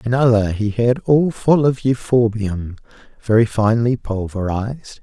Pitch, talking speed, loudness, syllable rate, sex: 115 Hz, 120 wpm, -17 LUFS, 4.4 syllables/s, male